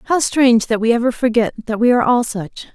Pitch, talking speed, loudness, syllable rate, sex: 235 Hz, 240 wpm, -16 LUFS, 5.7 syllables/s, female